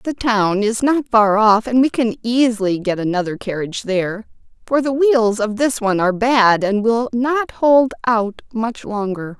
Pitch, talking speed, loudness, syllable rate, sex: 225 Hz, 185 wpm, -17 LUFS, 4.5 syllables/s, female